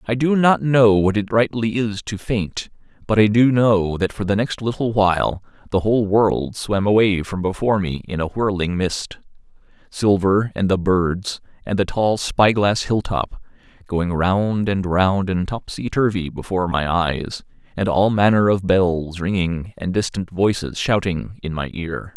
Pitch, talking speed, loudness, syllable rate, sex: 100 Hz, 175 wpm, -19 LUFS, 4.3 syllables/s, male